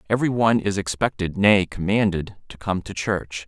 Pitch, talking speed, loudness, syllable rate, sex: 100 Hz, 175 wpm, -22 LUFS, 5.4 syllables/s, male